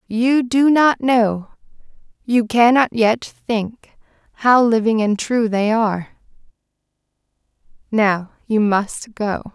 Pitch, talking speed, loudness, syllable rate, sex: 225 Hz, 105 wpm, -17 LUFS, 3.3 syllables/s, female